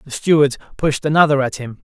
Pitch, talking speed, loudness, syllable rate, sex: 140 Hz, 190 wpm, -16 LUFS, 5.9 syllables/s, male